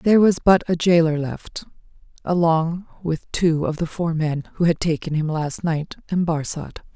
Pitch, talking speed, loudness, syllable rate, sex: 165 Hz, 180 wpm, -21 LUFS, 4.6 syllables/s, female